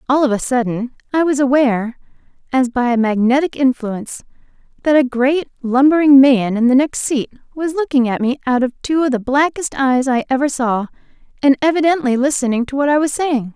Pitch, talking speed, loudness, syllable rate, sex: 265 Hz, 190 wpm, -16 LUFS, 5.5 syllables/s, female